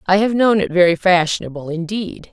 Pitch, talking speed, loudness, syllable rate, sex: 185 Hz, 180 wpm, -16 LUFS, 5.5 syllables/s, female